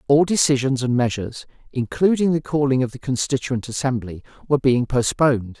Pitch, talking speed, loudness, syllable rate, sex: 130 Hz, 150 wpm, -20 LUFS, 5.7 syllables/s, male